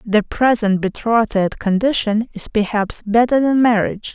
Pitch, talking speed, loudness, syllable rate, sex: 220 Hz, 130 wpm, -17 LUFS, 4.9 syllables/s, female